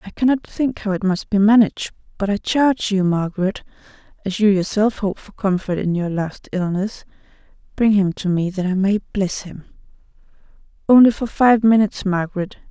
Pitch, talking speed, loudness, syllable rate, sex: 200 Hz, 175 wpm, -19 LUFS, 5.3 syllables/s, female